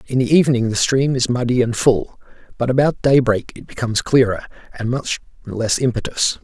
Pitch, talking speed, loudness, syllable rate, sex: 125 Hz, 175 wpm, -18 LUFS, 5.5 syllables/s, male